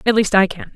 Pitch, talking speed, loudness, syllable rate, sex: 200 Hz, 320 wpm, -16 LUFS, 6.5 syllables/s, female